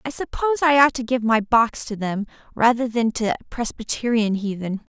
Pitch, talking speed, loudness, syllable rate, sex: 235 Hz, 180 wpm, -21 LUFS, 4.8 syllables/s, female